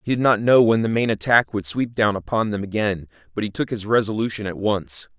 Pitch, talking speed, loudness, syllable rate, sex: 105 Hz, 245 wpm, -20 LUFS, 5.7 syllables/s, male